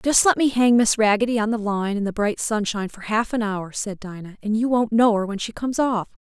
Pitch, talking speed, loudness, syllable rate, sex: 220 Hz, 270 wpm, -21 LUFS, 5.7 syllables/s, female